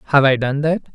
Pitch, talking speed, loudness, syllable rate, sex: 140 Hz, 255 wpm, -17 LUFS, 6.5 syllables/s, male